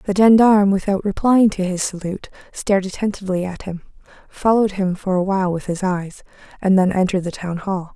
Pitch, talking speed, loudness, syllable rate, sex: 190 Hz, 190 wpm, -18 LUFS, 6.0 syllables/s, female